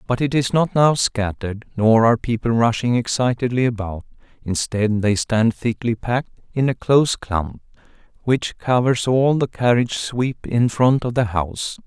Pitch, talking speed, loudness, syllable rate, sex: 120 Hz, 160 wpm, -19 LUFS, 4.7 syllables/s, male